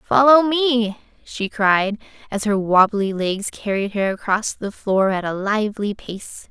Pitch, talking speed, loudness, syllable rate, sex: 210 Hz, 155 wpm, -19 LUFS, 3.9 syllables/s, female